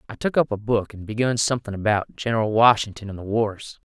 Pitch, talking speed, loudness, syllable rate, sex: 110 Hz, 215 wpm, -22 LUFS, 6.0 syllables/s, male